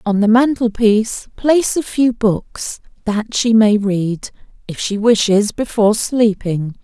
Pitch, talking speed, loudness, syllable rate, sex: 220 Hz, 150 wpm, -16 LUFS, 4.0 syllables/s, female